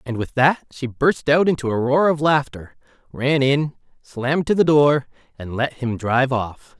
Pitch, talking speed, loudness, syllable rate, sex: 135 Hz, 195 wpm, -19 LUFS, 4.5 syllables/s, male